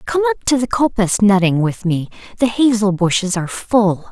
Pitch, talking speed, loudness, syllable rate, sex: 210 Hz, 190 wpm, -16 LUFS, 5.5 syllables/s, female